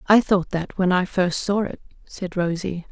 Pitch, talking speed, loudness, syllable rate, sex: 185 Hz, 205 wpm, -22 LUFS, 4.4 syllables/s, female